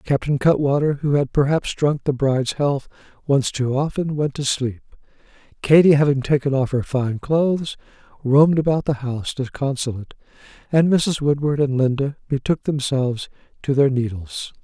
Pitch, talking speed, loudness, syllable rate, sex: 140 Hz, 150 wpm, -20 LUFS, 5.1 syllables/s, male